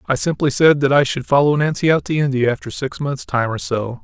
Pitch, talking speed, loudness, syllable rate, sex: 135 Hz, 255 wpm, -17 LUFS, 5.9 syllables/s, male